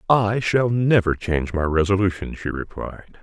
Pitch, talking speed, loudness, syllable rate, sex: 100 Hz, 150 wpm, -21 LUFS, 4.9 syllables/s, male